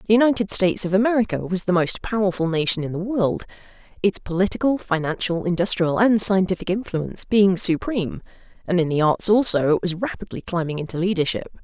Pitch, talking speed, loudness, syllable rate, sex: 185 Hz, 170 wpm, -21 LUFS, 6.0 syllables/s, female